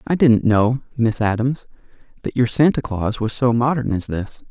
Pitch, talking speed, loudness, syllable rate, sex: 120 Hz, 185 wpm, -19 LUFS, 4.6 syllables/s, male